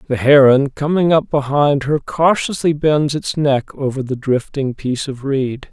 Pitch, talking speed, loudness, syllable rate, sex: 140 Hz, 170 wpm, -16 LUFS, 4.3 syllables/s, male